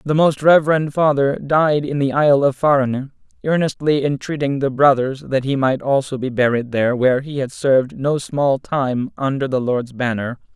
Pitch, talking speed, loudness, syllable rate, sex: 135 Hz, 180 wpm, -18 LUFS, 4.9 syllables/s, male